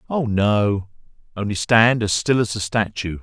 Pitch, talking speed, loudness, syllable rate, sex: 105 Hz, 150 wpm, -19 LUFS, 4.3 syllables/s, male